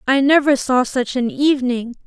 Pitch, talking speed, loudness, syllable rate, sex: 260 Hz, 175 wpm, -17 LUFS, 5.0 syllables/s, female